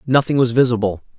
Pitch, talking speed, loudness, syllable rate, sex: 120 Hz, 150 wpm, -17 LUFS, 6.3 syllables/s, male